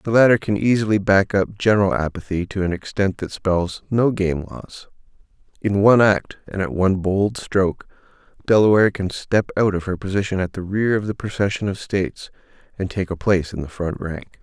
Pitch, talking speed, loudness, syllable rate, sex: 100 Hz, 195 wpm, -20 LUFS, 5.4 syllables/s, male